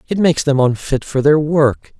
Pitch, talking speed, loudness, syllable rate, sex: 145 Hz, 210 wpm, -15 LUFS, 5.1 syllables/s, male